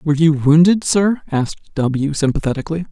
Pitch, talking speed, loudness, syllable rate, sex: 160 Hz, 145 wpm, -16 LUFS, 5.8 syllables/s, male